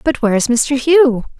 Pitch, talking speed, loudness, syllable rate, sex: 245 Hz, 215 wpm, -13 LUFS, 5.2 syllables/s, female